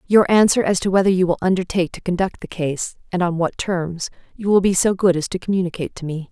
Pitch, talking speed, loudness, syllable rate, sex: 180 Hz, 245 wpm, -19 LUFS, 6.3 syllables/s, female